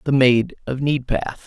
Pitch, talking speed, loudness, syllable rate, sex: 130 Hz, 165 wpm, -20 LUFS, 5.0 syllables/s, male